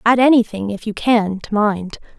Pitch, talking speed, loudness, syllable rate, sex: 215 Hz, 190 wpm, -17 LUFS, 4.7 syllables/s, female